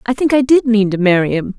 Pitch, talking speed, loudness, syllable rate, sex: 220 Hz, 305 wpm, -13 LUFS, 6.1 syllables/s, female